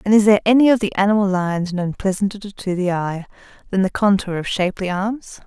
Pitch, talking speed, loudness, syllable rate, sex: 195 Hz, 210 wpm, -19 LUFS, 6.0 syllables/s, female